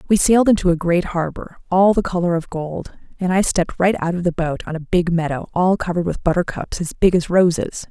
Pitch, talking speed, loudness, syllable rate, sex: 175 Hz, 235 wpm, -19 LUFS, 5.8 syllables/s, female